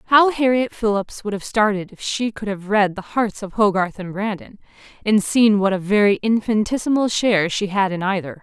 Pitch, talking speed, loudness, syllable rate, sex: 210 Hz, 200 wpm, -19 LUFS, 5.2 syllables/s, female